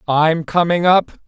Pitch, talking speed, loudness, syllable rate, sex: 165 Hz, 140 wpm, -15 LUFS, 3.8 syllables/s, male